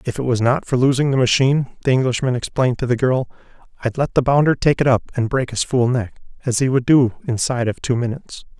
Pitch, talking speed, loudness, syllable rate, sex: 125 Hz, 235 wpm, -18 LUFS, 6.5 syllables/s, male